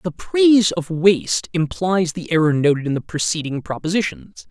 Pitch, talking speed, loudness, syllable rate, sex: 165 Hz, 160 wpm, -19 LUFS, 5.0 syllables/s, male